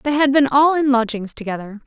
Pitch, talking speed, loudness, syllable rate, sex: 255 Hz, 225 wpm, -17 LUFS, 5.6 syllables/s, female